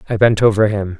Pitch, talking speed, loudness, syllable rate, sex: 105 Hz, 240 wpm, -14 LUFS, 6.3 syllables/s, male